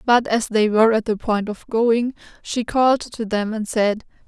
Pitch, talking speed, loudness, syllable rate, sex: 225 Hz, 210 wpm, -20 LUFS, 4.6 syllables/s, female